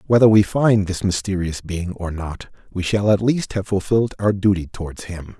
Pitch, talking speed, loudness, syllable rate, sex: 100 Hz, 200 wpm, -19 LUFS, 5.0 syllables/s, male